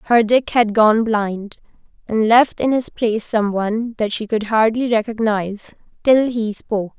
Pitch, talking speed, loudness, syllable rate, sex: 220 Hz, 170 wpm, -17 LUFS, 4.5 syllables/s, female